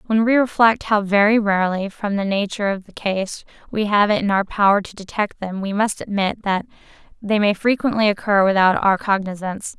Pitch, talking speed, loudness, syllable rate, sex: 205 Hz, 195 wpm, -19 LUFS, 5.4 syllables/s, female